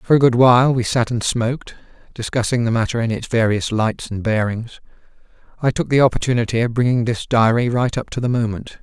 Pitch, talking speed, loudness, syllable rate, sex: 120 Hz, 205 wpm, -18 LUFS, 5.9 syllables/s, male